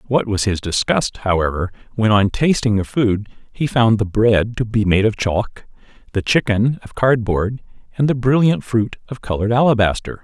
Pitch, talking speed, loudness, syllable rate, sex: 110 Hz, 175 wpm, -18 LUFS, 4.9 syllables/s, male